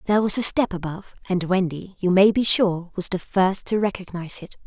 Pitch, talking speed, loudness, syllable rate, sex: 190 Hz, 220 wpm, -21 LUFS, 5.7 syllables/s, female